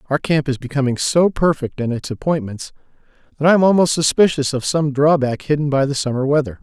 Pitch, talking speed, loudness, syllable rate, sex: 145 Hz, 200 wpm, -17 LUFS, 5.8 syllables/s, male